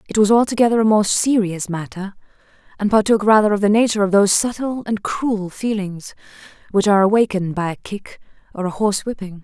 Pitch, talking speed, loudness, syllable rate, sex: 205 Hz, 185 wpm, -18 LUFS, 6.1 syllables/s, female